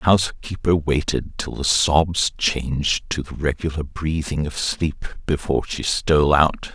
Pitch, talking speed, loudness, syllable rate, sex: 75 Hz, 150 wpm, -21 LUFS, 4.3 syllables/s, male